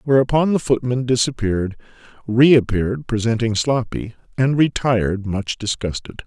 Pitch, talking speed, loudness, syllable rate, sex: 120 Hz, 105 wpm, -19 LUFS, 4.8 syllables/s, male